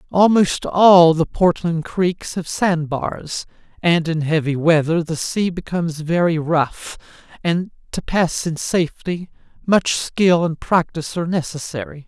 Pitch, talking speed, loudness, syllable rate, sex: 170 Hz, 140 wpm, -18 LUFS, 4.1 syllables/s, male